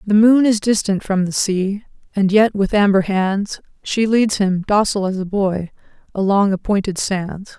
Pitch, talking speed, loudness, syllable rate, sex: 200 Hz, 175 wpm, -17 LUFS, 4.5 syllables/s, female